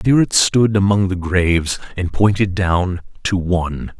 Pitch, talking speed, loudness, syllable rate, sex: 95 Hz, 165 wpm, -17 LUFS, 4.5 syllables/s, male